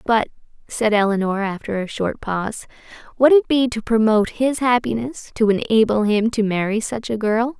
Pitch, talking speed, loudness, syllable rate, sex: 220 Hz, 175 wpm, -19 LUFS, 5.0 syllables/s, female